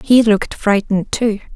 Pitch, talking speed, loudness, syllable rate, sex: 215 Hz, 155 wpm, -16 LUFS, 5.3 syllables/s, female